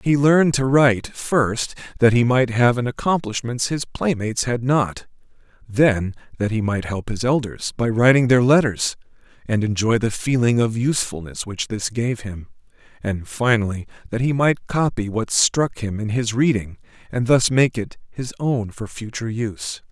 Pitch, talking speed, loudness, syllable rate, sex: 120 Hz, 170 wpm, -20 LUFS, 4.7 syllables/s, male